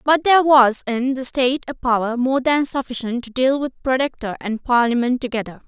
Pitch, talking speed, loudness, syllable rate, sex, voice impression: 255 Hz, 190 wpm, -19 LUFS, 5.4 syllables/s, female, very feminine, very young, very thin, very tensed, powerful, very bright, hard, very clear, fluent, slightly nasal, very cute, very refreshing, slightly sincere, calm, friendly, reassuring, very unique, elegant, very wild, slightly sweet, very lively, very strict, very intense, very sharp